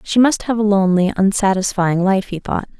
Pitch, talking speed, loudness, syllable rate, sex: 195 Hz, 195 wpm, -16 LUFS, 5.4 syllables/s, female